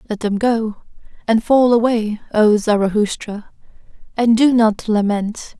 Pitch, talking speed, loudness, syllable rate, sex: 220 Hz, 130 wpm, -16 LUFS, 4.1 syllables/s, female